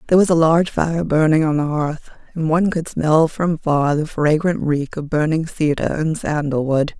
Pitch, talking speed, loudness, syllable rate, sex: 155 Hz, 205 wpm, -18 LUFS, 4.9 syllables/s, female